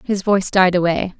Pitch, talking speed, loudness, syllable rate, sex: 185 Hz, 200 wpm, -16 LUFS, 5.6 syllables/s, female